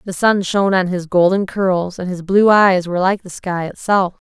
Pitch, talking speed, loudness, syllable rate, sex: 185 Hz, 225 wpm, -16 LUFS, 4.9 syllables/s, female